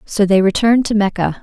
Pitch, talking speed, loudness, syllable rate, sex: 205 Hz, 210 wpm, -14 LUFS, 6.1 syllables/s, female